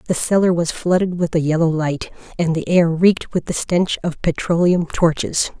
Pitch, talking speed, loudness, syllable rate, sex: 170 Hz, 195 wpm, -18 LUFS, 5.0 syllables/s, female